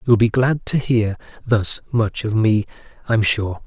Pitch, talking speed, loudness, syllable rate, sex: 110 Hz, 215 wpm, -19 LUFS, 4.7 syllables/s, male